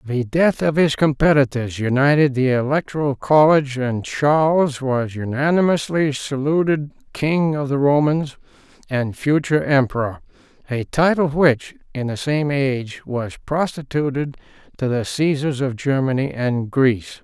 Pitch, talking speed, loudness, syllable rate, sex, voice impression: 140 Hz, 130 wpm, -19 LUFS, 4.5 syllables/s, male, masculine, adult-like, muffled, slightly friendly, slightly unique